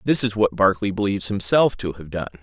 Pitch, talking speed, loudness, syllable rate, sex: 100 Hz, 225 wpm, -21 LUFS, 6.3 syllables/s, male